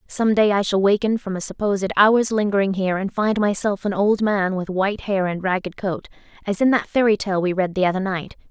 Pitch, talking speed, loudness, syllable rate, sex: 200 Hz, 235 wpm, -20 LUFS, 5.7 syllables/s, female